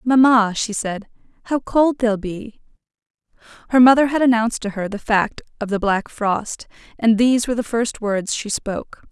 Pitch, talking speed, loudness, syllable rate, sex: 225 Hz, 180 wpm, -19 LUFS, 4.9 syllables/s, female